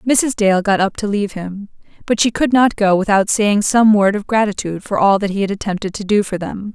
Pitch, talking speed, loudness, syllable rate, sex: 205 Hz, 250 wpm, -16 LUFS, 5.7 syllables/s, female